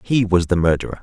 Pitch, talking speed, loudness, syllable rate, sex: 95 Hz, 235 wpm, -18 LUFS, 6.5 syllables/s, male